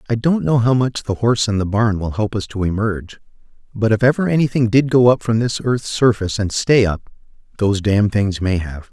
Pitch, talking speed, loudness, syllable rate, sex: 110 Hz, 220 wpm, -17 LUFS, 5.7 syllables/s, male